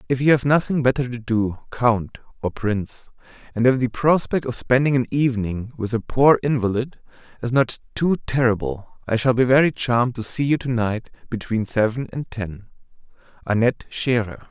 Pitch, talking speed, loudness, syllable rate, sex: 120 Hz, 165 wpm, -21 LUFS, 5.2 syllables/s, male